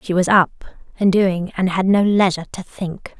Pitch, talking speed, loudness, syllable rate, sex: 185 Hz, 205 wpm, -18 LUFS, 4.7 syllables/s, female